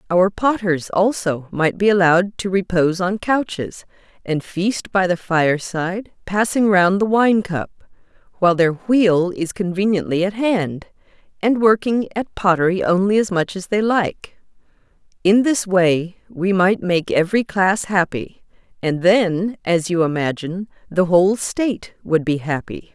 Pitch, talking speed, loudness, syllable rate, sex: 190 Hz, 145 wpm, -18 LUFS, 4.4 syllables/s, female